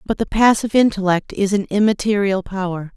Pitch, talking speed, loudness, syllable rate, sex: 200 Hz, 160 wpm, -18 LUFS, 5.7 syllables/s, female